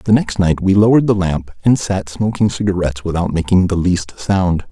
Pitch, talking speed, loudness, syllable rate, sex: 95 Hz, 205 wpm, -16 LUFS, 5.2 syllables/s, male